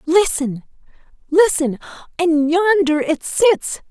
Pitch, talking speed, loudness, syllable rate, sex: 325 Hz, 90 wpm, -17 LUFS, 3.4 syllables/s, female